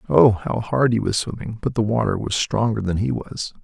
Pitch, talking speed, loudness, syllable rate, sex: 110 Hz, 230 wpm, -21 LUFS, 5.1 syllables/s, male